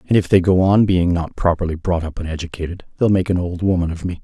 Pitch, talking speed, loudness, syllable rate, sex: 90 Hz, 270 wpm, -18 LUFS, 6.3 syllables/s, male